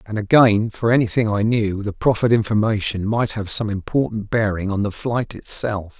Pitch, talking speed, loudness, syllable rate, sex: 110 Hz, 180 wpm, -19 LUFS, 5.1 syllables/s, male